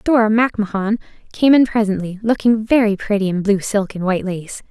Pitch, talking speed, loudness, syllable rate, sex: 210 Hz, 180 wpm, -17 LUFS, 5.5 syllables/s, female